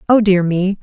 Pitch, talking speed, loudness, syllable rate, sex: 195 Hz, 220 wpm, -14 LUFS, 4.8 syllables/s, female